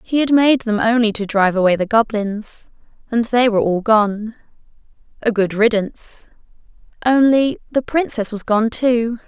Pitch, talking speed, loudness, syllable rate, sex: 225 Hz, 140 wpm, -17 LUFS, 4.7 syllables/s, female